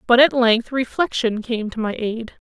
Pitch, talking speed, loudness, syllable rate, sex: 235 Hz, 195 wpm, -19 LUFS, 4.4 syllables/s, female